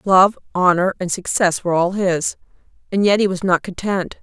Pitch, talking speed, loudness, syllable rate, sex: 185 Hz, 185 wpm, -18 LUFS, 5.1 syllables/s, female